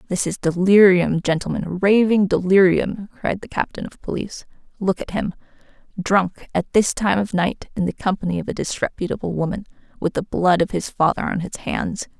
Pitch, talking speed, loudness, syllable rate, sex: 185 Hz, 175 wpm, -20 LUFS, 5.3 syllables/s, female